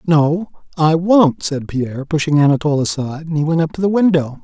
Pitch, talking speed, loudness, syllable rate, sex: 160 Hz, 205 wpm, -16 LUFS, 5.7 syllables/s, male